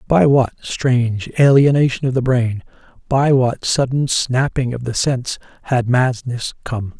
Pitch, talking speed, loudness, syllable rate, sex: 130 Hz, 145 wpm, -17 LUFS, 4.5 syllables/s, male